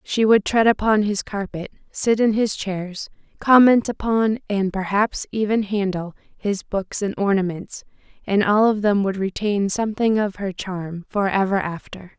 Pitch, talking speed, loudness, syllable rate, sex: 205 Hz, 160 wpm, -20 LUFS, 4.3 syllables/s, female